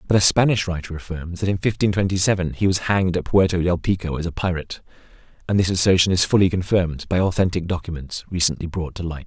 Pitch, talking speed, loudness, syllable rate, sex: 90 Hz, 215 wpm, -21 LUFS, 6.6 syllables/s, male